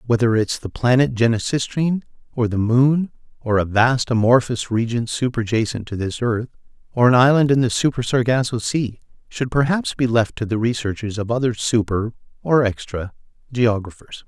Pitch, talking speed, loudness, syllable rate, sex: 120 Hz, 155 wpm, -19 LUFS, 5.1 syllables/s, male